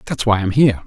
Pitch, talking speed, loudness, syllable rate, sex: 110 Hz, 345 wpm, -16 LUFS, 8.5 syllables/s, male